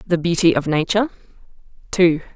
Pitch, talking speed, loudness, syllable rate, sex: 170 Hz, 125 wpm, -18 LUFS, 6.1 syllables/s, female